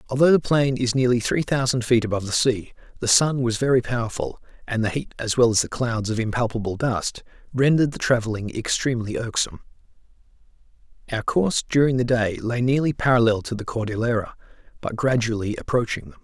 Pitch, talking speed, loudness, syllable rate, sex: 120 Hz, 175 wpm, -22 LUFS, 6.0 syllables/s, male